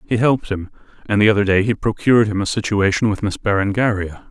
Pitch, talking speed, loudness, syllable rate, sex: 105 Hz, 210 wpm, -18 LUFS, 6.3 syllables/s, male